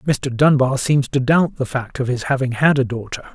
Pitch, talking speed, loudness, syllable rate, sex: 130 Hz, 235 wpm, -18 LUFS, 5.0 syllables/s, male